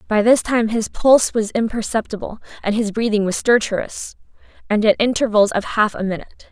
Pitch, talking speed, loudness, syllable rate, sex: 220 Hz, 175 wpm, -18 LUFS, 5.6 syllables/s, female